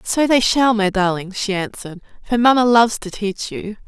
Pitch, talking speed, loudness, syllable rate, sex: 215 Hz, 200 wpm, -17 LUFS, 5.3 syllables/s, female